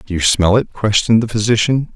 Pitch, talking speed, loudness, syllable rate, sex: 110 Hz, 215 wpm, -15 LUFS, 6.0 syllables/s, male